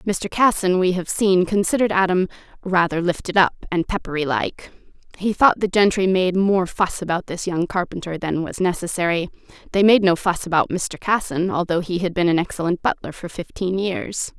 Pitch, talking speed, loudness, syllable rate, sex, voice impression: 185 Hz, 185 wpm, -20 LUFS, 5.2 syllables/s, female, feminine, adult-like, tensed, powerful, bright, slightly halting, intellectual, friendly, lively, slightly sharp